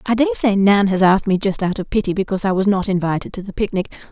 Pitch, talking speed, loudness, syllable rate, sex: 200 Hz, 275 wpm, -18 LUFS, 7.0 syllables/s, female